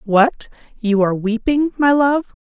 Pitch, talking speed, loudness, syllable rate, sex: 240 Hz, 150 wpm, -17 LUFS, 4.2 syllables/s, female